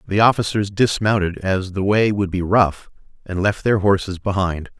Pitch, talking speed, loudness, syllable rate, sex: 100 Hz, 175 wpm, -19 LUFS, 4.7 syllables/s, male